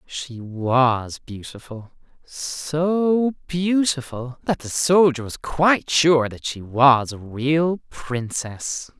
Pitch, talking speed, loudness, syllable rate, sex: 140 Hz, 115 wpm, -21 LUFS, 2.9 syllables/s, male